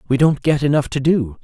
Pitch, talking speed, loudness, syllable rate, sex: 140 Hz, 250 wpm, -17 LUFS, 5.7 syllables/s, male